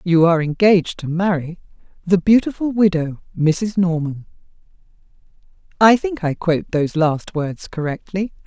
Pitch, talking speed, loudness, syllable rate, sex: 175 Hz, 130 wpm, -18 LUFS, 4.9 syllables/s, female